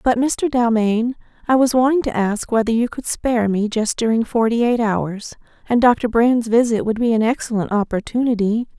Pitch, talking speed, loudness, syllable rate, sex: 230 Hz, 185 wpm, -18 LUFS, 5.0 syllables/s, female